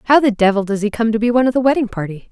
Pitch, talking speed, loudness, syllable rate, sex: 225 Hz, 340 wpm, -16 LUFS, 7.5 syllables/s, female